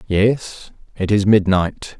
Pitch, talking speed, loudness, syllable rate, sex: 100 Hz, 120 wpm, -17 LUFS, 3.1 syllables/s, male